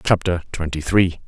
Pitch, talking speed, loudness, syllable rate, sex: 85 Hz, 140 wpm, -20 LUFS, 4.8 syllables/s, male